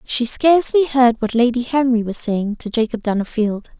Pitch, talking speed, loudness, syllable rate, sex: 240 Hz, 175 wpm, -17 LUFS, 4.9 syllables/s, female